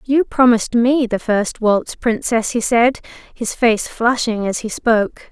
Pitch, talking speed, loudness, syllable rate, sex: 230 Hz, 170 wpm, -17 LUFS, 4.1 syllables/s, female